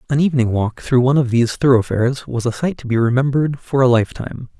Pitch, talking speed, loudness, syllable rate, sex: 125 Hz, 220 wpm, -17 LUFS, 7.0 syllables/s, male